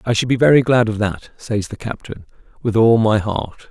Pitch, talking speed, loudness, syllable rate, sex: 110 Hz, 225 wpm, -17 LUFS, 5.0 syllables/s, male